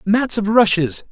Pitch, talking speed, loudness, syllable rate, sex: 205 Hz, 160 wpm, -16 LUFS, 4.0 syllables/s, male